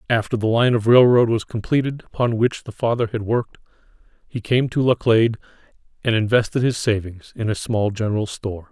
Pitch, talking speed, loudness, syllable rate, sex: 115 Hz, 180 wpm, -20 LUFS, 5.8 syllables/s, male